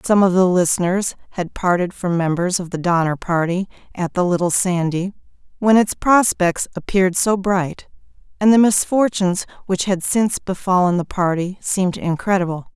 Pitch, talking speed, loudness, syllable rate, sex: 185 Hz, 155 wpm, -18 LUFS, 5.0 syllables/s, female